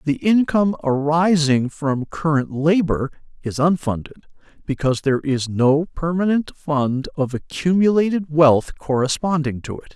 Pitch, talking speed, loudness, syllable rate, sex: 155 Hz, 120 wpm, -19 LUFS, 4.7 syllables/s, male